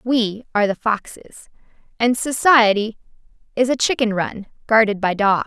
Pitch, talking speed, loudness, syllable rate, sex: 220 Hz, 130 wpm, -18 LUFS, 4.6 syllables/s, female